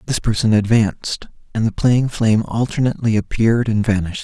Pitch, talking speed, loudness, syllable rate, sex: 110 Hz, 155 wpm, -18 LUFS, 6.1 syllables/s, male